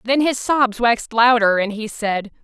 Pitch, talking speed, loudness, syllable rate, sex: 230 Hz, 195 wpm, -17 LUFS, 4.5 syllables/s, female